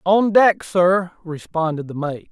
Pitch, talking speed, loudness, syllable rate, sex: 175 Hz, 155 wpm, -18 LUFS, 3.8 syllables/s, male